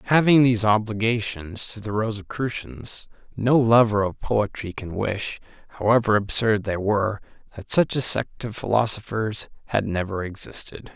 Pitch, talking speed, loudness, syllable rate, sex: 110 Hz, 135 wpm, -22 LUFS, 4.7 syllables/s, male